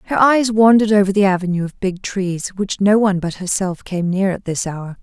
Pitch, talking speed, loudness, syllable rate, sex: 195 Hz, 225 wpm, -17 LUFS, 5.5 syllables/s, female